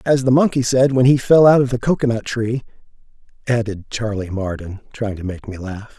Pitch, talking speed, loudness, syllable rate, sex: 115 Hz, 200 wpm, -18 LUFS, 5.2 syllables/s, male